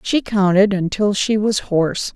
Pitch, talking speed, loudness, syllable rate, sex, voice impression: 200 Hz, 165 wpm, -17 LUFS, 4.4 syllables/s, female, very feminine, very middle-aged, thin, tensed, powerful, bright, slightly soft, very clear, fluent, slightly cool, intellectual, slightly refreshing, sincere, very calm, friendly, reassuring, very unique, slightly elegant, wild, slightly sweet, lively, kind, slightly intense